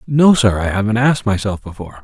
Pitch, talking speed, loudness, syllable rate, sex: 110 Hz, 205 wpm, -15 LUFS, 6.5 syllables/s, male